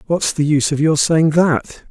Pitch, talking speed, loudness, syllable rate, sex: 155 Hz, 220 wpm, -15 LUFS, 4.6 syllables/s, male